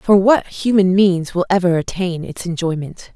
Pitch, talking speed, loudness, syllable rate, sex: 185 Hz, 170 wpm, -17 LUFS, 4.5 syllables/s, female